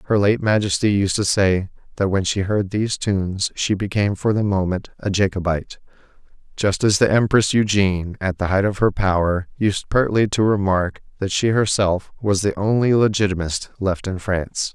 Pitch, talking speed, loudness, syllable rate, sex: 100 Hz, 180 wpm, -20 LUFS, 5.1 syllables/s, male